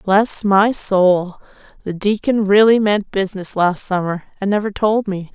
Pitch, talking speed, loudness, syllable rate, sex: 200 Hz, 155 wpm, -16 LUFS, 4.2 syllables/s, female